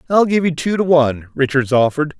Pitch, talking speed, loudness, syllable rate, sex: 150 Hz, 220 wpm, -16 LUFS, 6.2 syllables/s, male